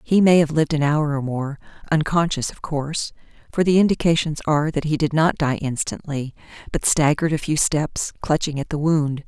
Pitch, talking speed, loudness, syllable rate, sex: 150 Hz, 190 wpm, -21 LUFS, 5.4 syllables/s, female